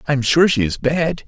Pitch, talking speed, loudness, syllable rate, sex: 140 Hz, 285 wpm, -17 LUFS, 5.5 syllables/s, male